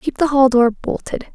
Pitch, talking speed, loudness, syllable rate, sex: 260 Hz, 225 wpm, -16 LUFS, 4.6 syllables/s, female